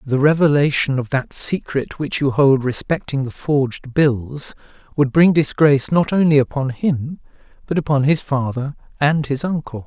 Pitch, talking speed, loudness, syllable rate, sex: 140 Hz, 160 wpm, -18 LUFS, 4.6 syllables/s, male